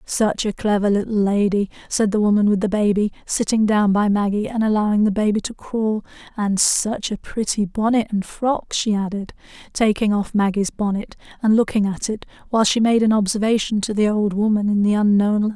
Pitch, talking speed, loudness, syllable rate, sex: 210 Hz, 195 wpm, -19 LUFS, 5.4 syllables/s, female